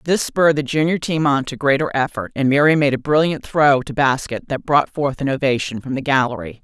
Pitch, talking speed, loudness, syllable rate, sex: 140 Hz, 225 wpm, -18 LUFS, 5.6 syllables/s, female